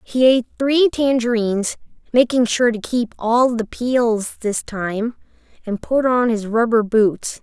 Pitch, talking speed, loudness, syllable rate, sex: 235 Hz, 155 wpm, -18 LUFS, 4.0 syllables/s, female